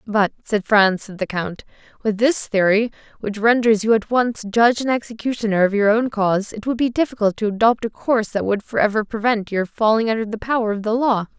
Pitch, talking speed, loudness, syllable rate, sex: 220 Hz, 215 wpm, -19 LUFS, 5.7 syllables/s, female